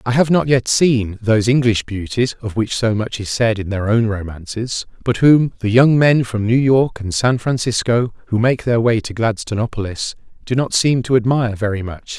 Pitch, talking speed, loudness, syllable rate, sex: 115 Hz, 205 wpm, -17 LUFS, 5.0 syllables/s, male